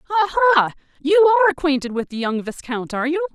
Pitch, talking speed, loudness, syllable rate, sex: 315 Hz, 195 wpm, -19 LUFS, 6.9 syllables/s, female